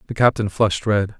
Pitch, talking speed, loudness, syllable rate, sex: 100 Hz, 200 wpm, -19 LUFS, 6.1 syllables/s, male